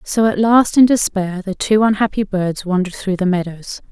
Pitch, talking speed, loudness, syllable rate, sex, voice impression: 200 Hz, 200 wpm, -16 LUFS, 5.1 syllables/s, female, feminine, adult-like, relaxed, weak, dark, soft, slightly fluent, calm, elegant, kind, modest